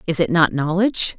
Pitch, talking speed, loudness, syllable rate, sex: 175 Hz, 205 wpm, -18 LUFS, 5.9 syllables/s, female